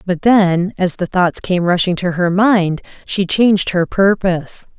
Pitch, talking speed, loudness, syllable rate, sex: 185 Hz, 175 wpm, -15 LUFS, 4.2 syllables/s, female